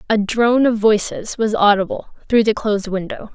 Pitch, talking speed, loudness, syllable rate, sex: 215 Hz, 180 wpm, -17 LUFS, 5.3 syllables/s, female